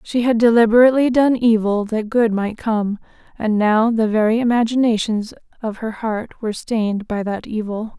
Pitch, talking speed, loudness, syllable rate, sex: 225 Hz, 165 wpm, -18 LUFS, 5.0 syllables/s, female